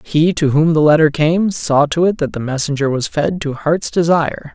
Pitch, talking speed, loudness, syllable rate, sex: 155 Hz, 225 wpm, -15 LUFS, 4.9 syllables/s, male